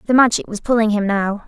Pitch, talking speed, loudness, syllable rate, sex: 215 Hz, 245 wpm, -17 LUFS, 6.1 syllables/s, female